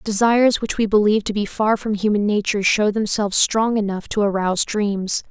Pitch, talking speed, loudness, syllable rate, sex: 210 Hz, 190 wpm, -19 LUFS, 5.6 syllables/s, female